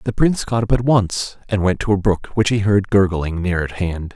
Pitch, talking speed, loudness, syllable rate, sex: 100 Hz, 260 wpm, -18 LUFS, 5.2 syllables/s, male